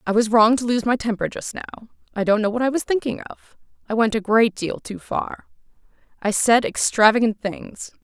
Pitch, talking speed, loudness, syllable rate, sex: 225 Hz, 210 wpm, -20 LUFS, 5.2 syllables/s, female